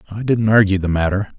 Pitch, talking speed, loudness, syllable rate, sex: 100 Hz, 215 wpm, -16 LUFS, 6.4 syllables/s, male